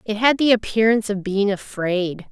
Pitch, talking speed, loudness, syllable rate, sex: 210 Hz, 180 wpm, -19 LUFS, 5.1 syllables/s, female